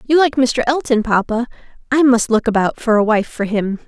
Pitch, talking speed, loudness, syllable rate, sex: 240 Hz, 200 wpm, -16 LUFS, 5.2 syllables/s, female